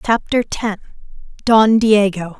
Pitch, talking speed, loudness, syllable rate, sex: 210 Hz, 100 wpm, -15 LUFS, 3.7 syllables/s, female